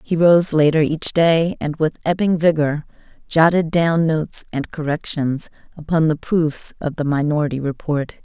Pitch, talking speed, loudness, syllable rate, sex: 155 Hz, 155 wpm, -18 LUFS, 4.6 syllables/s, female